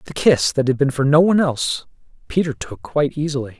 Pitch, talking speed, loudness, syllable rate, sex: 145 Hz, 215 wpm, -18 LUFS, 6.3 syllables/s, male